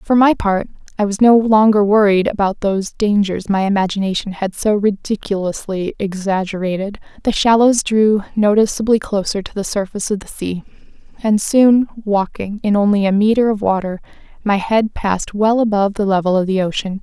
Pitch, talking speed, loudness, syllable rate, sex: 205 Hz, 165 wpm, -16 LUFS, 5.3 syllables/s, female